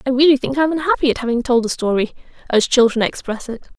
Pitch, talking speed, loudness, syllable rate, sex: 255 Hz, 220 wpm, -17 LUFS, 6.5 syllables/s, female